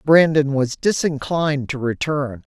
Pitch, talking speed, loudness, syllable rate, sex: 145 Hz, 120 wpm, -20 LUFS, 4.2 syllables/s, male